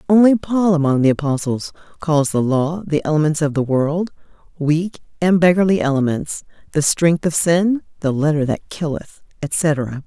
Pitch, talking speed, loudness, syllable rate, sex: 160 Hz, 155 wpm, -18 LUFS, 4.6 syllables/s, female